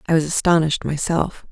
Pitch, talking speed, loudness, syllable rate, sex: 160 Hz, 160 wpm, -19 LUFS, 6.1 syllables/s, female